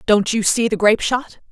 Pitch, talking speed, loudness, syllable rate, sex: 220 Hz, 240 wpm, -17 LUFS, 5.4 syllables/s, female